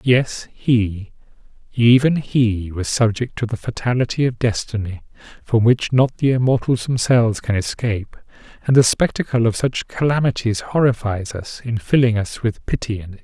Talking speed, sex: 155 wpm, male